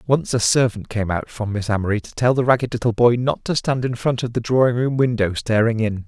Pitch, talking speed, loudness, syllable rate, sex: 115 Hz, 255 wpm, -20 LUFS, 5.7 syllables/s, male